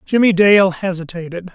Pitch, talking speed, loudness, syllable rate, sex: 185 Hz, 115 wpm, -14 LUFS, 4.9 syllables/s, male